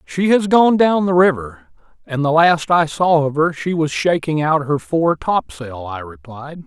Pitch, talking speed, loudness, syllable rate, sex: 150 Hz, 200 wpm, -16 LUFS, 4.2 syllables/s, male